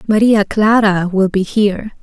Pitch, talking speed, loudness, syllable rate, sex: 205 Hz, 150 wpm, -13 LUFS, 4.5 syllables/s, female